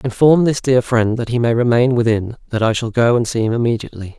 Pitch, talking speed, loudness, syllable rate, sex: 120 Hz, 245 wpm, -16 LUFS, 6.0 syllables/s, male